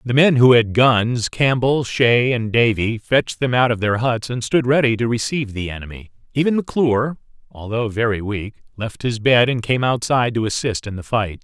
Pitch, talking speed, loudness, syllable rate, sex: 120 Hz, 190 wpm, -18 LUFS, 5.2 syllables/s, male